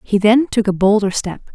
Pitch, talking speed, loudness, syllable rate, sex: 210 Hz, 235 wpm, -15 LUFS, 5.2 syllables/s, female